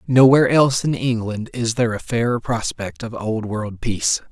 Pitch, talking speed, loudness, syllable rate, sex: 115 Hz, 180 wpm, -19 LUFS, 5.2 syllables/s, male